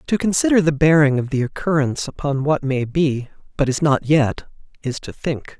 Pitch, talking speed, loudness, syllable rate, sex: 145 Hz, 195 wpm, -19 LUFS, 5.2 syllables/s, male